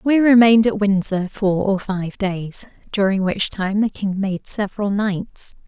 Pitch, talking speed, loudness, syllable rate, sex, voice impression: 200 Hz, 170 wpm, -19 LUFS, 4.2 syllables/s, female, feminine, adult-like, slightly relaxed, slightly weak, soft, fluent, intellectual, calm, friendly, reassuring, elegant, kind, slightly modest